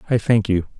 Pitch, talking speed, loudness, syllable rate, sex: 105 Hz, 230 wpm, -19 LUFS, 6.1 syllables/s, male